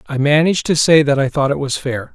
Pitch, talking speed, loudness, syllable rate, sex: 145 Hz, 280 wpm, -15 LUFS, 6.1 syllables/s, male